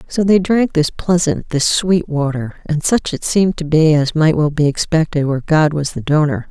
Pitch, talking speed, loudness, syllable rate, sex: 160 Hz, 220 wpm, -15 LUFS, 4.9 syllables/s, female